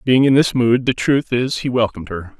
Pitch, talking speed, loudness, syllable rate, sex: 120 Hz, 250 wpm, -16 LUFS, 5.3 syllables/s, male